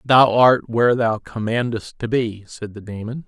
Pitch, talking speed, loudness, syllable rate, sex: 115 Hz, 185 wpm, -19 LUFS, 4.5 syllables/s, male